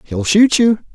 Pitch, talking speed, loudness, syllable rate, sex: 190 Hz, 190 wpm, -13 LUFS, 3.9 syllables/s, male